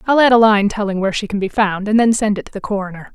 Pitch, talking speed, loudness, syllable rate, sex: 210 Hz, 325 wpm, -16 LUFS, 7.0 syllables/s, female